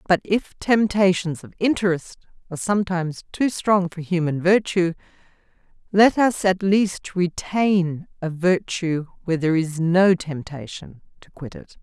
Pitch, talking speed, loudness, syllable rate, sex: 180 Hz, 135 wpm, -21 LUFS, 4.5 syllables/s, female